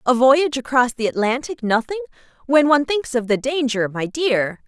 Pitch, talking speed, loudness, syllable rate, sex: 255 Hz, 180 wpm, -19 LUFS, 5.2 syllables/s, female